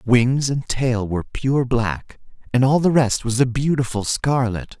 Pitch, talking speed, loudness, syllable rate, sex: 125 Hz, 175 wpm, -20 LUFS, 4.2 syllables/s, male